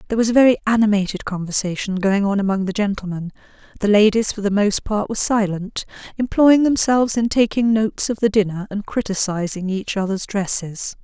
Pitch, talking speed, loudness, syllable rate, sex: 205 Hz, 175 wpm, -19 LUFS, 5.8 syllables/s, female